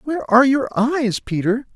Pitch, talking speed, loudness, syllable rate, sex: 250 Hz, 170 wpm, -18 LUFS, 5.2 syllables/s, male